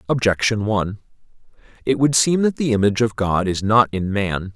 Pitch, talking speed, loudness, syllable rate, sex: 110 Hz, 185 wpm, -19 LUFS, 5.5 syllables/s, male